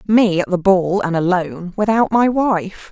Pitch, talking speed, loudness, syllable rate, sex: 195 Hz, 165 wpm, -16 LUFS, 4.4 syllables/s, female